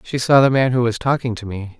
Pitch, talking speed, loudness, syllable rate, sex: 120 Hz, 300 wpm, -17 LUFS, 5.9 syllables/s, male